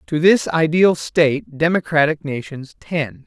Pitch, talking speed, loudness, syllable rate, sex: 155 Hz, 130 wpm, -18 LUFS, 4.2 syllables/s, male